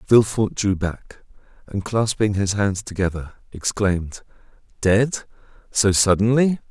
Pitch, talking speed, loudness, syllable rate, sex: 105 Hz, 90 wpm, -21 LUFS, 4.3 syllables/s, male